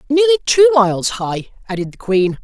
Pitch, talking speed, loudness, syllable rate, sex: 245 Hz, 170 wpm, -15 LUFS, 5.5 syllables/s, male